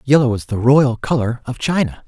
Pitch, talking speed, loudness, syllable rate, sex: 125 Hz, 205 wpm, -17 LUFS, 5.2 syllables/s, male